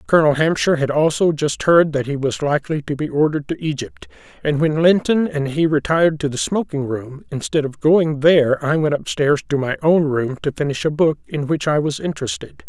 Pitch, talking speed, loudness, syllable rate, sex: 150 Hz, 215 wpm, -18 LUFS, 5.6 syllables/s, male